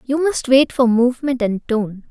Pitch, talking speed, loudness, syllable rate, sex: 250 Hz, 200 wpm, -17 LUFS, 4.5 syllables/s, female